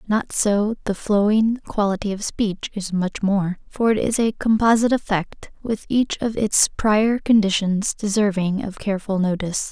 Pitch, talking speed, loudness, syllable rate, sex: 205 Hz, 155 wpm, -20 LUFS, 4.6 syllables/s, female